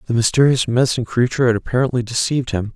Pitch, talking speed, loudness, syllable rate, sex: 120 Hz, 175 wpm, -17 LUFS, 7.9 syllables/s, male